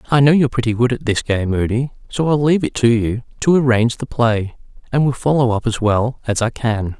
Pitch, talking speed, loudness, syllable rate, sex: 120 Hz, 240 wpm, -17 LUFS, 5.8 syllables/s, male